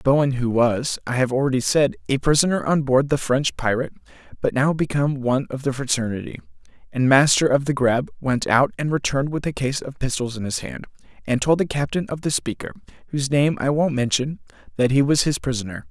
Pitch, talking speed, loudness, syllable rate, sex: 135 Hz, 205 wpm, -21 LUFS, 5.9 syllables/s, male